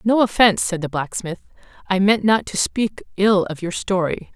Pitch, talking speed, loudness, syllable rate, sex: 195 Hz, 195 wpm, -19 LUFS, 5.0 syllables/s, female